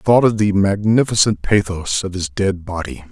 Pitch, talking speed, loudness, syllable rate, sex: 100 Hz, 195 wpm, -17 LUFS, 5.1 syllables/s, male